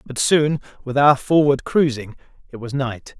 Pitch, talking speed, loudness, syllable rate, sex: 135 Hz, 170 wpm, -18 LUFS, 4.4 syllables/s, male